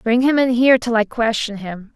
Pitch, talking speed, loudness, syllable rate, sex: 235 Hz, 245 wpm, -17 LUFS, 5.2 syllables/s, female